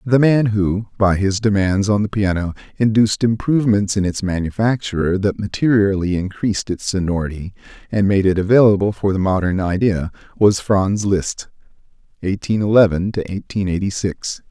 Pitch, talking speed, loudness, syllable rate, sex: 100 Hz, 150 wpm, -18 LUFS, 4.5 syllables/s, male